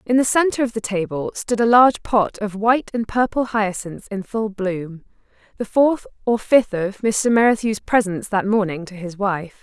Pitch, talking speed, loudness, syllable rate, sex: 210 Hz, 195 wpm, -19 LUFS, 4.7 syllables/s, female